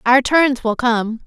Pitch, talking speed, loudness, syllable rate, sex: 245 Hz, 190 wpm, -16 LUFS, 3.6 syllables/s, female